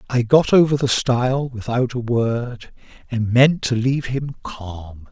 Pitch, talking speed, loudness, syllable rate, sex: 125 Hz, 165 wpm, -19 LUFS, 4.2 syllables/s, male